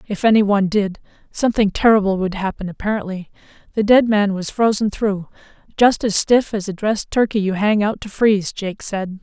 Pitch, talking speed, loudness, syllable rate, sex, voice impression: 205 Hz, 190 wpm, -18 LUFS, 5.4 syllables/s, female, feminine, adult-like, slightly relaxed, slightly bright, soft, slightly muffled, intellectual, friendly, reassuring, slightly unique, kind